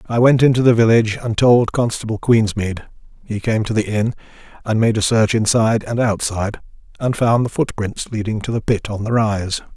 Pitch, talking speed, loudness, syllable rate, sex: 110 Hz, 195 wpm, -17 LUFS, 5.5 syllables/s, male